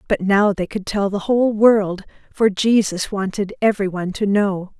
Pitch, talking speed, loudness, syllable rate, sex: 200 Hz, 175 wpm, -18 LUFS, 4.7 syllables/s, female